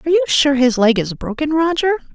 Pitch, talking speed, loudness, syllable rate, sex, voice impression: 275 Hz, 225 wpm, -16 LUFS, 6.4 syllables/s, female, feminine, adult-like, tensed, bright, slightly soft, clear, fluent, slightly intellectual, calm, friendly, reassuring, elegant, kind